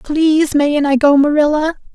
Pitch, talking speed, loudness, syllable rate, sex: 295 Hz, 155 wpm, -13 LUFS, 4.8 syllables/s, female